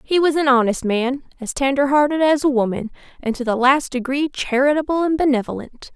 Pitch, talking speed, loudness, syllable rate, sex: 270 Hz, 190 wpm, -19 LUFS, 5.6 syllables/s, female